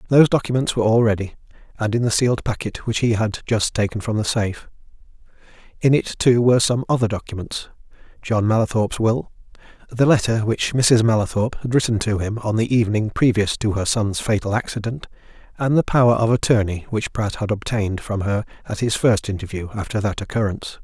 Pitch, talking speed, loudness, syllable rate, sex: 110 Hz, 180 wpm, -20 LUFS, 6.0 syllables/s, male